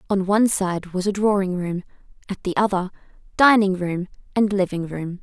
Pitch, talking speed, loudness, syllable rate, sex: 190 Hz, 170 wpm, -21 LUFS, 5.2 syllables/s, female